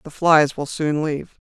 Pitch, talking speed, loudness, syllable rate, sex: 150 Hz, 205 wpm, -20 LUFS, 4.7 syllables/s, female